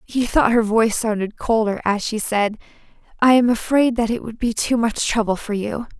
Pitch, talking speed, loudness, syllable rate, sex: 225 Hz, 210 wpm, -19 LUFS, 5.0 syllables/s, female